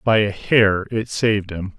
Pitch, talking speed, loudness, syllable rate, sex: 105 Hz, 200 wpm, -19 LUFS, 4.2 syllables/s, male